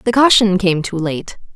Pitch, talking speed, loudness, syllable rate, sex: 195 Hz, 195 wpm, -14 LUFS, 4.6 syllables/s, female